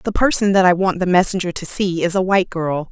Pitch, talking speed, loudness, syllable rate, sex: 185 Hz, 270 wpm, -17 LUFS, 5.9 syllables/s, female